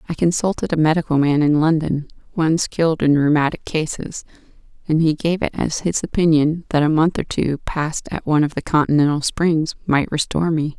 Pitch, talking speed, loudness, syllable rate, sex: 155 Hz, 190 wpm, -19 LUFS, 5.6 syllables/s, female